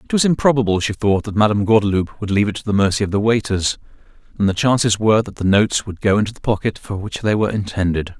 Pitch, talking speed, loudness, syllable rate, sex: 105 Hz, 250 wpm, -18 LUFS, 6.8 syllables/s, male